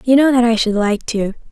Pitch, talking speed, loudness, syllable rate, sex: 235 Hz, 280 wpm, -15 LUFS, 5.5 syllables/s, female